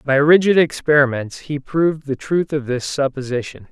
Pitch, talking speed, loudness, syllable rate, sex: 145 Hz, 160 wpm, -18 LUFS, 5.0 syllables/s, male